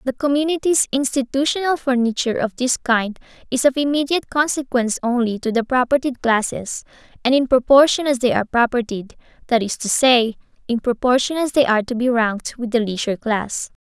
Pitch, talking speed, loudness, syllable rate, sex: 250 Hz, 170 wpm, -19 LUFS, 5.7 syllables/s, female